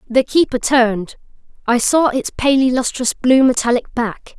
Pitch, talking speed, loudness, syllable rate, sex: 250 Hz, 135 wpm, -16 LUFS, 4.8 syllables/s, female